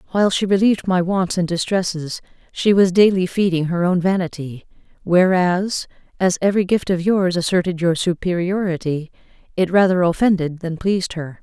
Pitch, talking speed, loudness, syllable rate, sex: 180 Hz, 150 wpm, -18 LUFS, 5.3 syllables/s, female